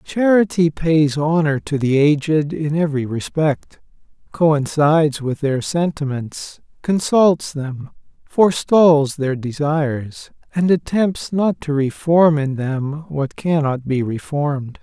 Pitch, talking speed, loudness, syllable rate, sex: 150 Hz, 115 wpm, -18 LUFS, 3.7 syllables/s, male